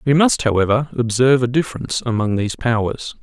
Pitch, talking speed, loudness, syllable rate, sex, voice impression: 125 Hz, 165 wpm, -18 LUFS, 6.3 syllables/s, male, masculine, adult-like, slightly hard, fluent, cool, intellectual, sincere, calm, slightly strict